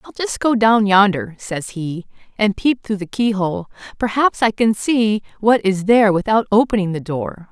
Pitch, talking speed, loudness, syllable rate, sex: 210 Hz, 190 wpm, -17 LUFS, 4.6 syllables/s, female